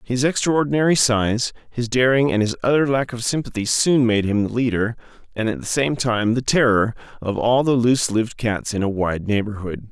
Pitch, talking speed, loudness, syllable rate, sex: 120 Hz, 190 wpm, -20 LUFS, 5.3 syllables/s, male